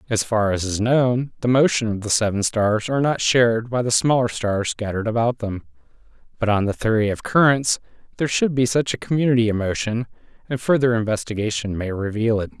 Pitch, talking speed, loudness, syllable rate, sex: 115 Hz, 195 wpm, -20 LUFS, 5.8 syllables/s, male